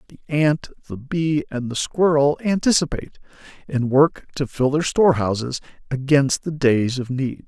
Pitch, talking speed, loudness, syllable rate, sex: 140 Hz, 155 wpm, -20 LUFS, 5.0 syllables/s, male